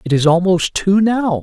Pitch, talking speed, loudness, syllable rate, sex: 185 Hz, 210 wpm, -14 LUFS, 4.5 syllables/s, male